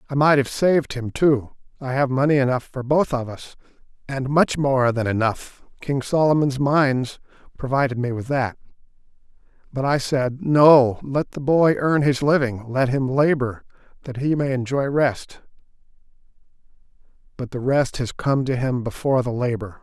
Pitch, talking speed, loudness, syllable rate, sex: 135 Hz, 155 wpm, -20 LUFS, 4.7 syllables/s, male